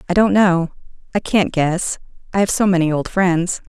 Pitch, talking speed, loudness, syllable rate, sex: 180 Hz, 160 wpm, -17 LUFS, 4.8 syllables/s, female